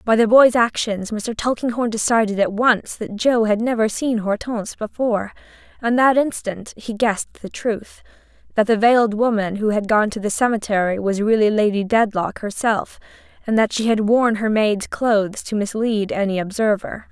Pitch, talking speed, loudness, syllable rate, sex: 220 Hz, 170 wpm, -19 LUFS, 4.9 syllables/s, female